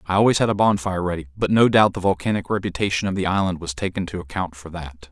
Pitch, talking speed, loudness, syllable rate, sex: 95 Hz, 245 wpm, -21 LUFS, 6.8 syllables/s, male